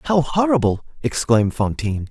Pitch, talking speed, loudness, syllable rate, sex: 135 Hz, 115 wpm, -19 LUFS, 5.4 syllables/s, male